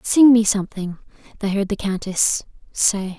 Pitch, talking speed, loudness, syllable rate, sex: 205 Hz, 150 wpm, -19 LUFS, 4.6 syllables/s, female